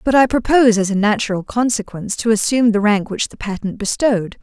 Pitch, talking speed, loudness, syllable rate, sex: 220 Hz, 205 wpm, -17 LUFS, 6.3 syllables/s, female